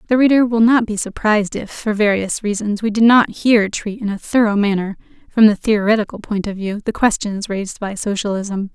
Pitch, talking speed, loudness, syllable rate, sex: 210 Hz, 205 wpm, -17 LUFS, 5.5 syllables/s, female